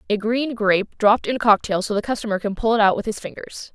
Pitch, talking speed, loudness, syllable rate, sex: 220 Hz, 275 wpm, -20 LUFS, 6.4 syllables/s, female